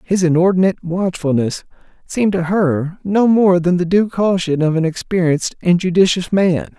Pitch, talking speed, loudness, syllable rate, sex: 175 Hz, 160 wpm, -16 LUFS, 5.1 syllables/s, male